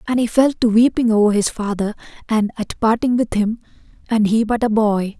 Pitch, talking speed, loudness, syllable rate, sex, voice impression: 220 Hz, 210 wpm, -17 LUFS, 5.3 syllables/s, female, very feminine, slightly adult-like, thin, relaxed, very powerful, slightly dark, hard, muffled, fluent, very raspy, cool, intellectual, slightly refreshing, slightly sincere, calm, slightly friendly, slightly reassuring, very unique, slightly elegant, very wild, slightly sweet, lively, kind, slightly intense, sharp, slightly modest, light